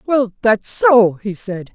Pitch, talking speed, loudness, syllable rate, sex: 210 Hz, 170 wpm, -15 LUFS, 3.4 syllables/s, female